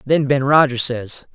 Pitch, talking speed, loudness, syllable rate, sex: 135 Hz, 180 wpm, -16 LUFS, 4.2 syllables/s, male